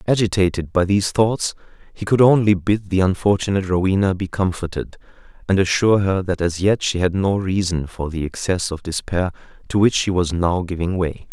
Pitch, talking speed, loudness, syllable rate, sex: 95 Hz, 185 wpm, -19 LUFS, 5.4 syllables/s, male